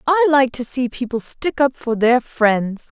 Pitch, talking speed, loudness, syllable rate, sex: 250 Hz, 200 wpm, -18 LUFS, 4.0 syllables/s, female